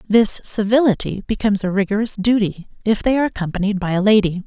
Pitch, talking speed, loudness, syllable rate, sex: 205 Hz, 175 wpm, -18 LUFS, 6.3 syllables/s, female